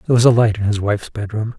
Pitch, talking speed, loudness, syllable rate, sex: 110 Hz, 305 wpm, -17 LUFS, 7.8 syllables/s, male